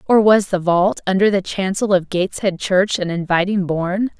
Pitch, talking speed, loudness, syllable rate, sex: 190 Hz, 185 wpm, -17 LUFS, 5.1 syllables/s, female